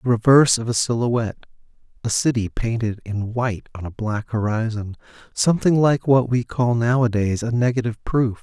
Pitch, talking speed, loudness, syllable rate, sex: 115 Hz, 155 wpm, -20 LUFS, 5.4 syllables/s, male